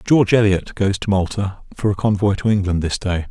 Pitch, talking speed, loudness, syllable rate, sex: 100 Hz, 220 wpm, -18 LUFS, 5.6 syllables/s, male